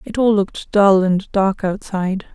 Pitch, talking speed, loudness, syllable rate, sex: 195 Hz, 180 wpm, -17 LUFS, 4.5 syllables/s, female